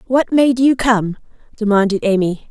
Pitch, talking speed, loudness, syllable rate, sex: 225 Hz, 145 wpm, -15 LUFS, 4.6 syllables/s, female